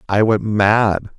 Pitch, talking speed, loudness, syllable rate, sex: 105 Hz, 150 wpm, -16 LUFS, 3.2 syllables/s, male